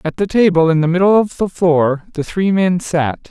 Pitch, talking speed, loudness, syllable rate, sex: 170 Hz, 235 wpm, -15 LUFS, 4.9 syllables/s, male